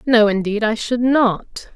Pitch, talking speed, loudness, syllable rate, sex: 225 Hz, 170 wpm, -17 LUFS, 3.7 syllables/s, female